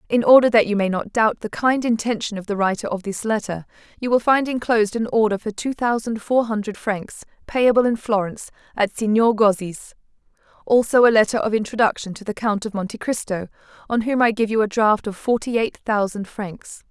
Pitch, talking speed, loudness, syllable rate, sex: 220 Hz, 200 wpm, -20 LUFS, 5.5 syllables/s, female